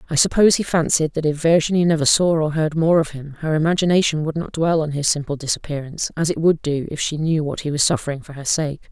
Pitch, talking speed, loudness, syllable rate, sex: 155 Hz, 250 wpm, -19 LUFS, 6.4 syllables/s, female